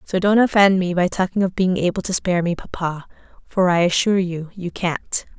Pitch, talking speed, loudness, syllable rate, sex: 185 Hz, 210 wpm, -19 LUFS, 5.4 syllables/s, female